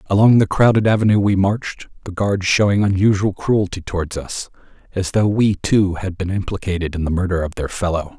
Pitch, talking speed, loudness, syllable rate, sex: 95 Hz, 190 wpm, -18 LUFS, 5.5 syllables/s, male